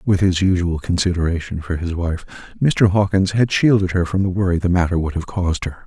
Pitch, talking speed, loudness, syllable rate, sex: 90 Hz, 215 wpm, -19 LUFS, 5.8 syllables/s, male